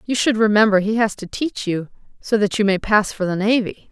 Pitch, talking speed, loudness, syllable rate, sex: 210 Hz, 245 wpm, -19 LUFS, 5.4 syllables/s, female